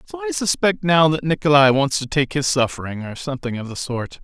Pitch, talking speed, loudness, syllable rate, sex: 140 Hz, 225 wpm, -19 LUFS, 5.7 syllables/s, male